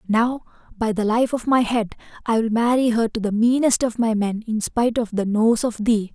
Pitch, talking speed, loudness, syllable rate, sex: 225 Hz, 235 wpm, -20 LUFS, 5.0 syllables/s, female